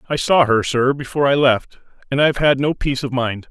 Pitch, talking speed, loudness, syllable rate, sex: 135 Hz, 240 wpm, -17 LUFS, 5.9 syllables/s, male